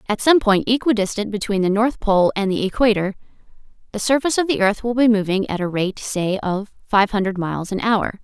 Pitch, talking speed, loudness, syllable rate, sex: 210 Hz, 210 wpm, -19 LUFS, 5.6 syllables/s, female